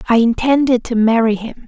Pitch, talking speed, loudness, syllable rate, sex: 235 Hz, 180 wpm, -15 LUFS, 5.4 syllables/s, female